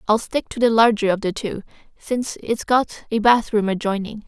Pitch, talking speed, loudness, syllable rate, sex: 220 Hz, 195 wpm, -20 LUFS, 5.5 syllables/s, female